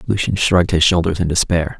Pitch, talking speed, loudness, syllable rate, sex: 90 Hz, 200 wpm, -16 LUFS, 6.1 syllables/s, male